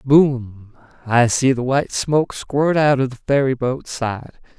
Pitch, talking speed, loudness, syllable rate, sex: 130 Hz, 155 wpm, -18 LUFS, 4.0 syllables/s, male